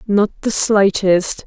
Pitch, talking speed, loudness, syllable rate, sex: 200 Hz, 125 wpm, -15 LUFS, 3.3 syllables/s, female